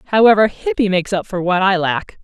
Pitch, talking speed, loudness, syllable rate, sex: 200 Hz, 215 wpm, -16 LUFS, 5.6 syllables/s, female